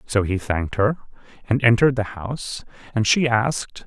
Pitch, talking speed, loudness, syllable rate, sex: 115 Hz, 170 wpm, -21 LUFS, 5.3 syllables/s, male